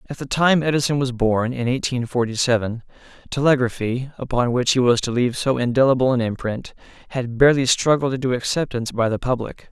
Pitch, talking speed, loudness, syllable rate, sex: 125 Hz, 180 wpm, -20 LUFS, 5.9 syllables/s, male